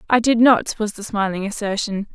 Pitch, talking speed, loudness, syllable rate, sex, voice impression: 215 Hz, 195 wpm, -19 LUFS, 5.2 syllables/s, female, very feminine, slightly young, very adult-like, very thin, tensed, slightly weak, bright, slightly hard, clear, slightly halting, cool, very intellectual, very refreshing, very sincere, slightly calm, friendly, slightly reassuring, slightly unique, elegant, wild, slightly sweet, slightly strict, slightly sharp, slightly modest